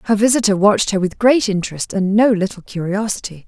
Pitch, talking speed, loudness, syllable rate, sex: 205 Hz, 190 wpm, -16 LUFS, 6.1 syllables/s, female